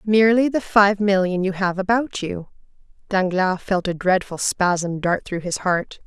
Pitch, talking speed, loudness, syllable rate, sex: 190 Hz, 170 wpm, -20 LUFS, 4.3 syllables/s, female